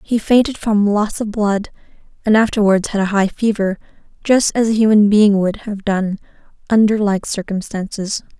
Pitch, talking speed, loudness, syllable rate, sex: 210 Hz, 155 wpm, -16 LUFS, 4.6 syllables/s, female